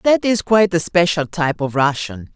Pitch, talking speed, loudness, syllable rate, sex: 175 Hz, 205 wpm, -17 LUFS, 5.2 syllables/s, female